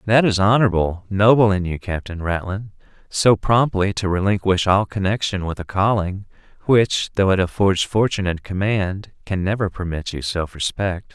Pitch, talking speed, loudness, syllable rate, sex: 100 Hz, 160 wpm, -19 LUFS, 4.9 syllables/s, male